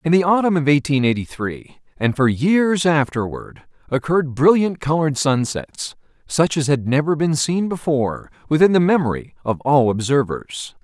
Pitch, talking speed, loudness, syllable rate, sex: 150 Hz, 155 wpm, -18 LUFS, 4.8 syllables/s, male